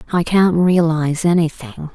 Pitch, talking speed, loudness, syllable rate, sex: 165 Hz, 125 wpm, -16 LUFS, 4.8 syllables/s, female